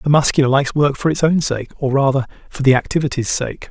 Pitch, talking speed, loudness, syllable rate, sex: 140 Hz, 225 wpm, -17 LUFS, 6.5 syllables/s, male